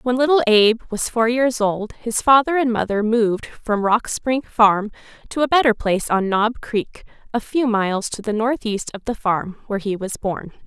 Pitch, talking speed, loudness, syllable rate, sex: 225 Hz, 200 wpm, -19 LUFS, 4.8 syllables/s, female